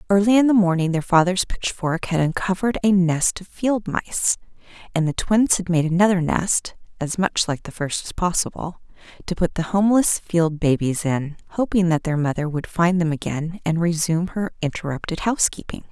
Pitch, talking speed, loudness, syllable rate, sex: 175 Hz, 180 wpm, -21 LUFS, 5.2 syllables/s, female